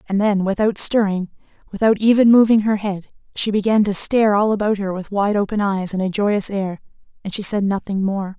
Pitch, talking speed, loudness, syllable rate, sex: 205 Hz, 210 wpm, -18 LUFS, 5.4 syllables/s, female